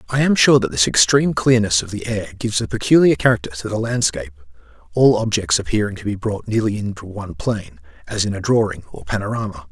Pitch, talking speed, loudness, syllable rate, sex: 115 Hz, 205 wpm, -18 LUFS, 6.4 syllables/s, male